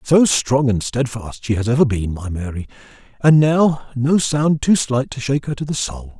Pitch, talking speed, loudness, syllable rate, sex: 130 Hz, 215 wpm, -18 LUFS, 4.7 syllables/s, male